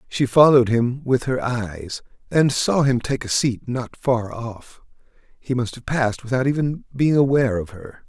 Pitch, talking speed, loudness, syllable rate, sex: 125 Hz, 185 wpm, -20 LUFS, 4.6 syllables/s, male